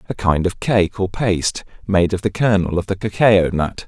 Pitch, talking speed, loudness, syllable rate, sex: 95 Hz, 215 wpm, -18 LUFS, 4.9 syllables/s, male